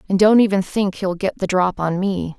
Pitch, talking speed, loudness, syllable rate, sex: 190 Hz, 250 wpm, -18 LUFS, 5.0 syllables/s, female